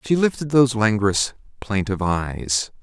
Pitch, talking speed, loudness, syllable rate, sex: 110 Hz, 125 wpm, -21 LUFS, 5.0 syllables/s, male